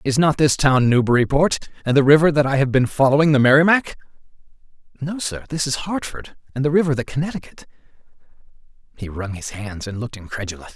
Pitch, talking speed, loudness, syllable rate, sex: 135 Hz, 180 wpm, -19 LUFS, 6.2 syllables/s, male